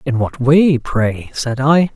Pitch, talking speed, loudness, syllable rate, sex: 135 Hz, 185 wpm, -15 LUFS, 3.3 syllables/s, male